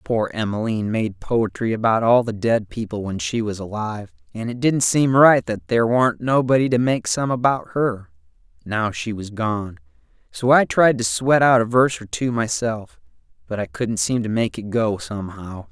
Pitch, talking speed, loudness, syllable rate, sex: 110 Hz, 195 wpm, -20 LUFS, 4.8 syllables/s, male